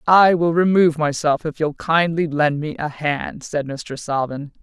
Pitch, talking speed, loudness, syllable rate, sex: 155 Hz, 180 wpm, -19 LUFS, 4.3 syllables/s, female